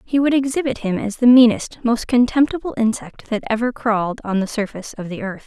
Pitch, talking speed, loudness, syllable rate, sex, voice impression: 230 Hz, 210 wpm, -18 LUFS, 5.8 syllables/s, female, feminine, slightly young, slightly relaxed, bright, soft, clear, raspy, slightly cute, intellectual, friendly, reassuring, elegant, kind, modest